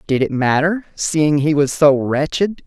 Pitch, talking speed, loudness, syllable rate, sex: 150 Hz, 180 wpm, -16 LUFS, 4.1 syllables/s, female